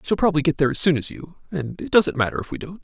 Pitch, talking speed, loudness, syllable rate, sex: 160 Hz, 340 wpm, -21 LUFS, 7.4 syllables/s, male